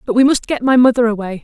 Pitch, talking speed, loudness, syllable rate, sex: 240 Hz, 290 wpm, -14 LUFS, 6.9 syllables/s, female